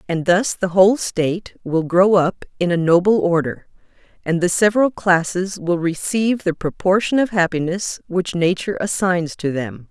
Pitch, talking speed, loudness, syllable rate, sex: 180 Hz, 165 wpm, -18 LUFS, 4.9 syllables/s, female